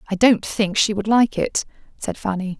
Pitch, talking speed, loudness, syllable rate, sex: 200 Hz, 210 wpm, -20 LUFS, 4.9 syllables/s, female